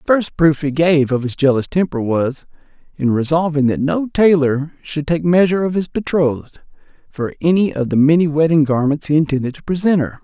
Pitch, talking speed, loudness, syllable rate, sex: 155 Hz, 195 wpm, -16 LUFS, 5.5 syllables/s, male